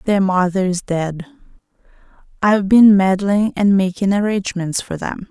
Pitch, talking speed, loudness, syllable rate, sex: 195 Hz, 135 wpm, -16 LUFS, 4.7 syllables/s, female